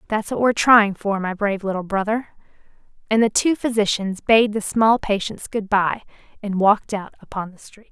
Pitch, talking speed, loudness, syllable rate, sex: 210 Hz, 190 wpm, -20 LUFS, 5.3 syllables/s, female